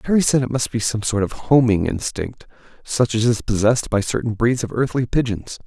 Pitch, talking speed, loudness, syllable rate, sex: 115 Hz, 210 wpm, -20 LUFS, 5.4 syllables/s, male